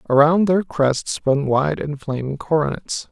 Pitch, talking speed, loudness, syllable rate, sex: 145 Hz, 155 wpm, -19 LUFS, 4.1 syllables/s, male